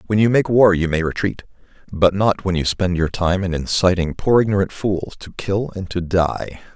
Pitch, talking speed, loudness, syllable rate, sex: 95 Hz, 215 wpm, -18 LUFS, 4.9 syllables/s, male